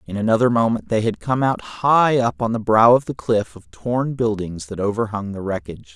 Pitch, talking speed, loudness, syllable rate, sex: 110 Hz, 220 wpm, -19 LUFS, 5.2 syllables/s, male